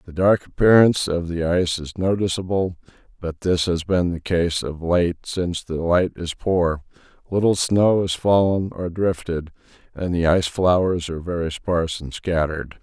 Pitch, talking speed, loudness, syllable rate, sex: 90 Hz, 170 wpm, -21 LUFS, 4.8 syllables/s, male